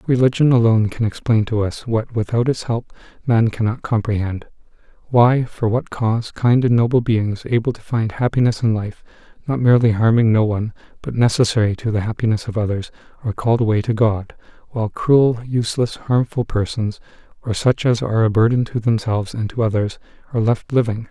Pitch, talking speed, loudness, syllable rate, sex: 115 Hz, 175 wpm, -18 LUFS, 5.7 syllables/s, male